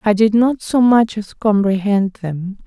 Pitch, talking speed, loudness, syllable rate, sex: 210 Hz, 180 wpm, -16 LUFS, 4.0 syllables/s, female